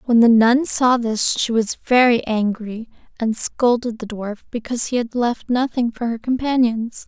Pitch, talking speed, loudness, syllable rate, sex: 235 Hz, 180 wpm, -19 LUFS, 4.5 syllables/s, female